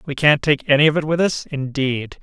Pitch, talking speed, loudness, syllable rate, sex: 145 Hz, 245 wpm, -18 LUFS, 5.3 syllables/s, male